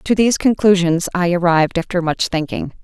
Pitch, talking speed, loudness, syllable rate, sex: 180 Hz, 170 wpm, -16 LUFS, 5.6 syllables/s, female